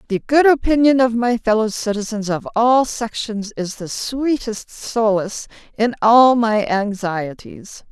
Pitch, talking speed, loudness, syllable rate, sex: 225 Hz, 135 wpm, -18 LUFS, 4.0 syllables/s, female